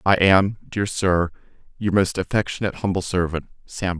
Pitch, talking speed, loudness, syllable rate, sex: 95 Hz, 150 wpm, -22 LUFS, 5.0 syllables/s, male